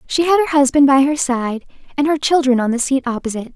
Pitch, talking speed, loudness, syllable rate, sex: 275 Hz, 235 wpm, -16 LUFS, 6.2 syllables/s, female